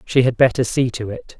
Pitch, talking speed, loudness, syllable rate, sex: 120 Hz, 260 wpm, -18 LUFS, 5.4 syllables/s, male